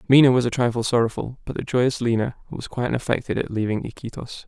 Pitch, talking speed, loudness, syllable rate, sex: 120 Hz, 200 wpm, -22 LUFS, 6.6 syllables/s, male